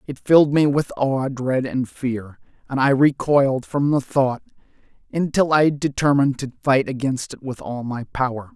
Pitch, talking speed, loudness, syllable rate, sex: 135 Hz, 175 wpm, -20 LUFS, 4.7 syllables/s, male